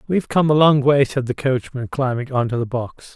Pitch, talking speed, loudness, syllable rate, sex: 135 Hz, 230 wpm, -19 LUFS, 5.4 syllables/s, male